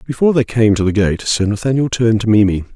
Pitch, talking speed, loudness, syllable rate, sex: 110 Hz, 240 wpm, -15 LUFS, 6.7 syllables/s, male